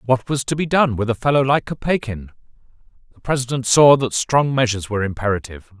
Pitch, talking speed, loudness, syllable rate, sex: 125 Hz, 185 wpm, -18 LUFS, 6.3 syllables/s, male